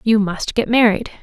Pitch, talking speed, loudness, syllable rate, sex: 215 Hz, 195 wpm, -16 LUFS, 4.9 syllables/s, female